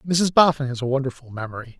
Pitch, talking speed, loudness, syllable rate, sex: 135 Hz, 200 wpm, -21 LUFS, 6.3 syllables/s, male